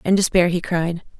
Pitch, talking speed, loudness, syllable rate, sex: 175 Hz, 200 wpm, -19 LUFS, 5.1 syllables/s, female